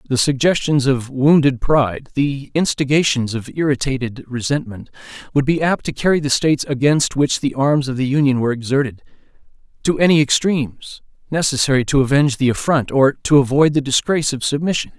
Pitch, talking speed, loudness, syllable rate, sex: 140 Hz, 165 wpm, -17 LUFS, 5.7 syllables/s, male